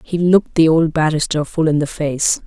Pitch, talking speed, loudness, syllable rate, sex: 160 Hz, 220 wpm, -16 LUFS, 5.1 syllables/s, female